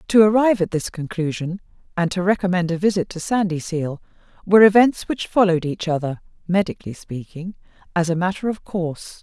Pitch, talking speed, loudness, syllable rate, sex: 180 Hz, 165 wpm, -20 LUFS, 5.5 syllables/s, female